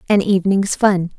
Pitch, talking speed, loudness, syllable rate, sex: 190 Hz, 150 wpm, -16 LUFS, 5.1 syllables/s, female